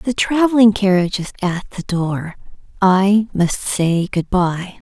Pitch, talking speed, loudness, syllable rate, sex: 195 Hz, 145 wpm, -17 LUFS, 4.0 syllables/s, female